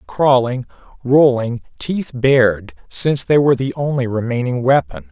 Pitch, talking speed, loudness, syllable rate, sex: 125 Hz, 130 wpm, -16 LUFS, 4.7 syllables/s, male